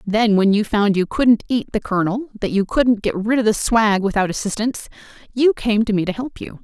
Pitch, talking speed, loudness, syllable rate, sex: 215 Hz, 235 wpm, -18 LUFS, 5.3 syllables/s, female